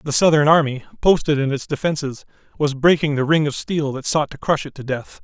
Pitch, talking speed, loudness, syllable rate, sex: 145 Hz, 230 wpm, -19 LUFS, 5.7 syllables/s, male